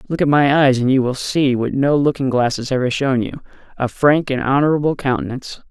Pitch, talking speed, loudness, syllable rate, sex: 135 Hz, 210 wpm, -17 LUFS, 5.7 syllables/s, male